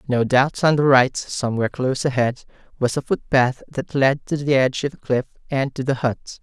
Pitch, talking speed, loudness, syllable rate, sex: 130 Hz, 215 wpm, -20 LUFS, 5.3 syllables/s, male